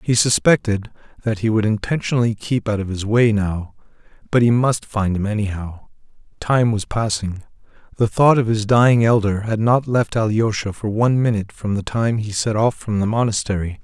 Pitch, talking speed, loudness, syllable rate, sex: 110 Hz, 185 wpm, -19 LUFS, 5.2 syllables/s, male